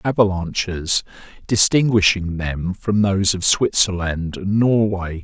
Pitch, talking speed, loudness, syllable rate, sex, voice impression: 95 Hz, 105 wpm, -18 LUFS, 4.0 syllables/s, male, masculine, very adult-like, slightly thick, cool, sincere, slightly kind